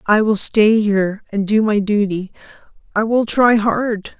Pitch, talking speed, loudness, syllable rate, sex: 210 Hz, 155 wpm, -16 LUFS, 4.2 syllables/s, female